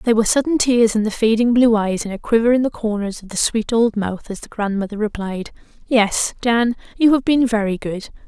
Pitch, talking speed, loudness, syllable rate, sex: 225 Hz, 225 wpm, -18 LUFS, 5.5 syllables/s, female